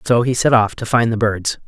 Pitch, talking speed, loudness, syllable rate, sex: 115 Hz, 285 wpm, -16 LUFS, 5.2 syllables/s, male